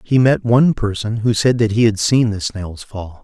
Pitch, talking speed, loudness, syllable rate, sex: 110 Hz, 240 wpm, -16 LUFS, 4.8 syllables/s, male